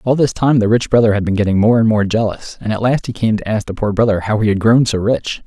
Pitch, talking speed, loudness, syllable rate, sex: 110 Hz, 320 wpm, -15 LUFS, 6.2 syllables/s, male